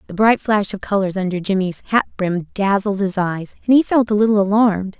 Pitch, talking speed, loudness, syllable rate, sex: 200 Hz, 215 wpm, -18 LUFS, 5.6 syllables/s, female